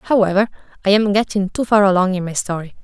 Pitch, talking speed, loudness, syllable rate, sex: 195 Hz, 210 wpm, -17 LUFS, 6.4 syllables/s, female